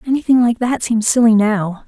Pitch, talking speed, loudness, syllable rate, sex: 230 Hz, 190 wpm, -15 LUFS, 5.2 syllables/s, female